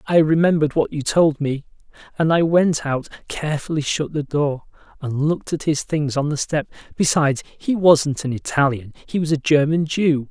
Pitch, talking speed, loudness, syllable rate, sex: 150 Hz, 180 wpm, -20 LUFS, 5.0 syllables/s, male